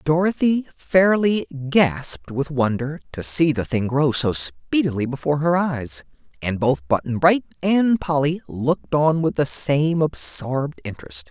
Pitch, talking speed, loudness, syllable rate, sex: 140 Hz, 150 wpm, -20 LUFS, 4.3 syllables/s, male